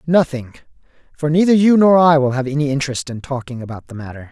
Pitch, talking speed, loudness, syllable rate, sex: 145 Hz, 210 wpm, -16 LUFS, 6.5 syllables/s, male